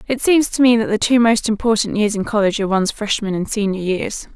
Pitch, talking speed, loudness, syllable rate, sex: 215 Hz, 250 wpm, -17 LUFS, 6.2 syllables/s, female